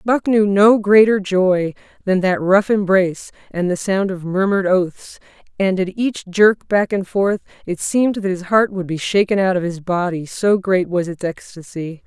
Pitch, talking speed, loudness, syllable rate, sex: 190 Hz, 195 wpm, -17 LUFS, 4.5 syllables/s, female